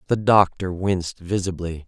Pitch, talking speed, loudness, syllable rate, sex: 95 Hz, 130 wpm, -21 LUFS, 4.8 syllables/s, male